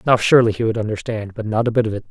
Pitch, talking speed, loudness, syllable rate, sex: 110 Hz, 315 wpm, -18 LUFS, 7.7 syllables/s, male